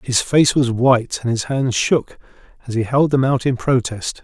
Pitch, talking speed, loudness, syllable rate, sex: 125 Hz, 210 wpm, -17 LUFS, 4.7 syllables/s, male